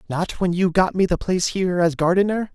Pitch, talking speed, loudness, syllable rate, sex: 180 Hz, 235 wpm, -20 LUFS, 5.9 syllables/s, male